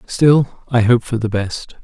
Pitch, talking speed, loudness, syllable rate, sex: 120 Hz, 195 wpm, -16 LUFS, 3.7 syllables/s, male